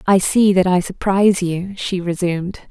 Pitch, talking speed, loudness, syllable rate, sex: 185 Hz, 180 wpm, -17 LUFS, 4.9 syllables/s, female